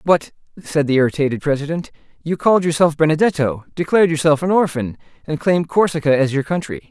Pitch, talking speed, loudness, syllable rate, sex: 155 Hz, 165 wpm, -18 LUFS, 6.4 syllables/s, male